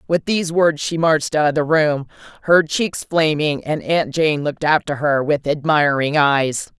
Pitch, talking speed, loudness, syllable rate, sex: 150 Hz, 185 wpm, -18 LUFS, 4.6 syllables/s, female